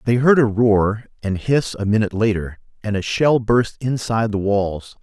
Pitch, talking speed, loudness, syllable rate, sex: 110 Hz, 190 wpm, -19 LUFS, 4.8 syllables/s, male